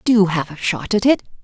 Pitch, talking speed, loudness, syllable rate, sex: 190 Hz, 250 wpm, -18 LUFS, 5.2 syllables/s, female